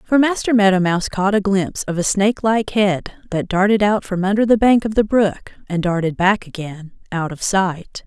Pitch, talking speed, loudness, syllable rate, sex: 195 Hz, 210 wpm, -17 LUFS, 5.2 syllables/s, female